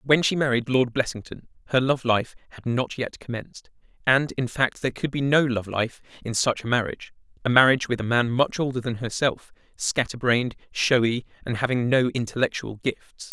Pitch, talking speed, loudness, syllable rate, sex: 125 Hz, 185 wpm, -24 LUFS, 5.4 syllables/s, male